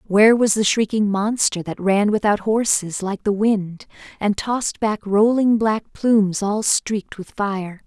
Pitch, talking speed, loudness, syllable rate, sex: 210 Hz, 170 wpm, -19 LUFS, 4.2 syllables/s, female